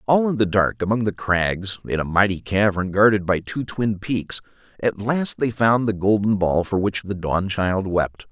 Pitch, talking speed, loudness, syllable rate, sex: 100 Hz, 200 wpm, -21 LUFS, 4.5 syllables/s, male